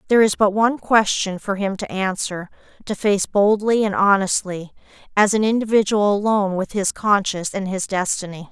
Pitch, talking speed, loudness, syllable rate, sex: 200 Hz, 170 wpm, -19 LUFS, 5.3 syllables/s, female